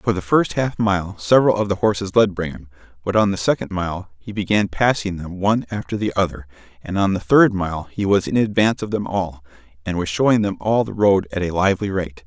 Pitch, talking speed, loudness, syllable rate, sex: 95 Hz, 230 wpm, -19 LUFS, 5.7 syllables/s, male